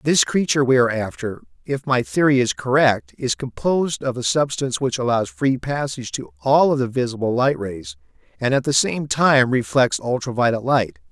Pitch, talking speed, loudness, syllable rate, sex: 130 Hz, 190 wpm, -20 LUFS, 5.2 syllables/s, male